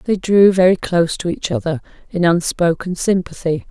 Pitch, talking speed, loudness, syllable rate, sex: 175 Hz, 160 wpm, -16 LUFS, 5.0 syllables/s, female